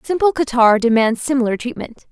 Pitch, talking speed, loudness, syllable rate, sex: 250 Hz, 140 wpm, -16 LUFS, 5.5 syllables/s, female